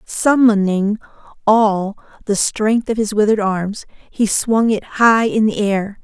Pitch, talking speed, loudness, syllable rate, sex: 210 Hz, 150 wpm, -16 LUFS, 3.9 syllables/s, female